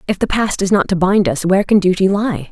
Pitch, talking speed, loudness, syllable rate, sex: 190 Hz, 285 wpm, -15 LUFS, 6.0 syllables/s, female